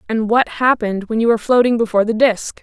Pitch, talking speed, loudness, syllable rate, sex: 225 Hz, 230 wpm, -16 LUFS, 6.5 syllables/s, female